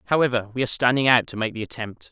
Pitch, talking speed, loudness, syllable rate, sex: 120 Hz, 255 wpm, -22 LUFS, 7.6 syllables/s, male